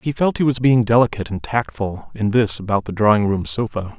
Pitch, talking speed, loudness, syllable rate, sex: 110 Hz, 225 wpm, -19 LUFS, 5.6 syllables/s, male